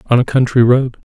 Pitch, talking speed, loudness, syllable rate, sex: 125 Hz, 215 wpm, -13 LUFS, 5.6 syllables/s, male